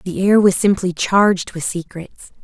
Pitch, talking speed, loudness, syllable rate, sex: 185 Hz, 170 wpm, -16 LUFS, 4.5 syllables/s, female